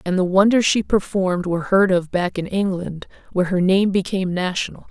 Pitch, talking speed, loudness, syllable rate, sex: 185 Hz, 195 wpm, -19 LUFS, 5.7 syllables/s, female